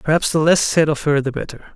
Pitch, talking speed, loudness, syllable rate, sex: 150 Hz, 275 wpm, -17 LUFS, 6.1 syllables/s, male